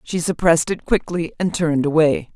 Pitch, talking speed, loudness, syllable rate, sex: 165 Hz, 180 wpm, -19 LUFS, 5.5 syllables/s, female